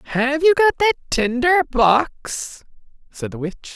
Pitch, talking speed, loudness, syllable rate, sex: 285 Hz, 145 wpm, -18 LUFS, 4.3 syllables/s, male